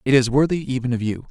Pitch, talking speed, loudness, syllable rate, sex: 130 Hz, 275 wpm, -20 LUFS, 6.8 syllables/s, male